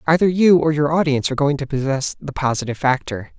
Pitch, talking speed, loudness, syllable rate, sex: 145 Hz, 215 wpm, -18 LUFS, 6.6 syllables/s, male